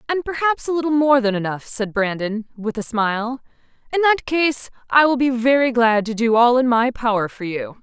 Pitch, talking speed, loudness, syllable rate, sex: 245 Hz, 215 wpm, -19 LUFS, 5.1 syllables/s, female